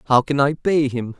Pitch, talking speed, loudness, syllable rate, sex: 140 Hz, 250 wpm, -19 LUFS, 5.1 syllables/s, male